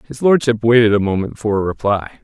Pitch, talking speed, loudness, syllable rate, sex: 110 Hz, 215 wpm, -16 LUFS, 6.2 syllables/s, male